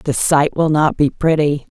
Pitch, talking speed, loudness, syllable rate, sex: 150 Hz, 205 wpm, -15 LUFS, 4.2 syllables/s, female